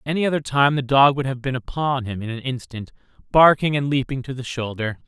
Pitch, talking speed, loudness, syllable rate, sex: 130 Hz, 235 wpm, -20 LUFS, 6.0 syllables/s, male